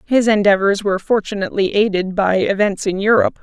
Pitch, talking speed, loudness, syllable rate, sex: 200 Hz, 160 wpm, -16 LUFS, 6.0 syllables/s, female